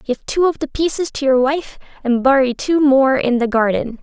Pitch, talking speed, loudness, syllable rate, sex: 270 Hz, 225 wpm, -16 LUFS, 4.8 syllables/s, female